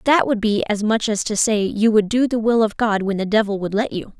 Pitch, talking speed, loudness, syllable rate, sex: 215 Hz, 300 wpm, -19 LUFS, 5.5 syllables/s, female